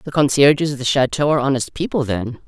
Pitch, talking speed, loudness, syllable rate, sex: 140 Hz, 220 wpm, -17 LUFS, 6.3 syllables/s, female